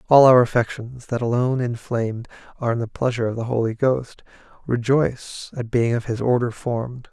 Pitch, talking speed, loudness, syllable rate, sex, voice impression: 120 Hz, 175 wpm, -21 LUFS, 5.7 syllables/s, male, masculine, adult-like, slightly relaxed, weak, very calm, sweet, kind, slightly modest